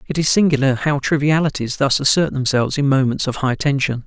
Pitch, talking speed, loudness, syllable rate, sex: 140 Hz, 190 wpm, -17 LUFS, 5.9 syllables/s, male